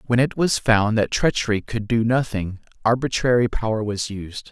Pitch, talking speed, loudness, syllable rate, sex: 115 Hz, 175 wpm, -21 LUFS, 4.8 syllables/s, male